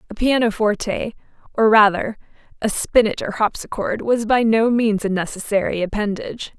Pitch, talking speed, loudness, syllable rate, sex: 215 Hz, 135 wpm, -19 LUFS, 5.1 syllables/s, female